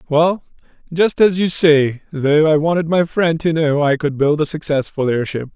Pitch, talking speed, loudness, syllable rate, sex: 155 Hz, 195 wpm, -16 LUFS, 4.6 syllables/s, male